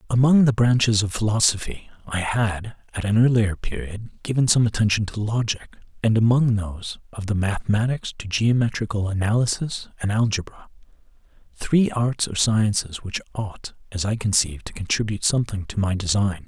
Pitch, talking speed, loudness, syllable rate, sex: 110 Hz, 150 wpm, -22 LUFS, 5.3 syllables/s, male